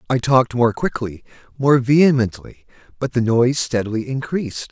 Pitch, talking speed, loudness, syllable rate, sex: 125 Hz, 125 wpm, -18 LUFS, 5.5 syllables/s, male